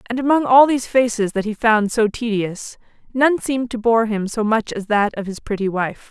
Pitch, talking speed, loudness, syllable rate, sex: 225 Hz, 225 wpm, -18 LUFS, 5.2 syllables/s, female